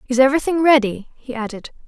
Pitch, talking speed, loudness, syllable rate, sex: 255 Hz, 160 wpm, -17 LUFS, 6.5 syllables/s, female